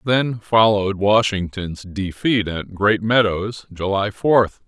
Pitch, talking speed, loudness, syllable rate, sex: 105 Hz, 115 wpm, -19 LUFS, 3.7 syllables/s, male